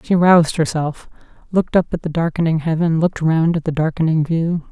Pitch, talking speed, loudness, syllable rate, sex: 165 Hz, 190 wpm, -17 LUFS, 5.7 syllables/s, female